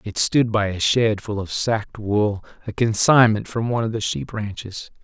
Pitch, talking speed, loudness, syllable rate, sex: 105 Hz, 205 wpm, -20 LUFS, 4.8 syllables/s, male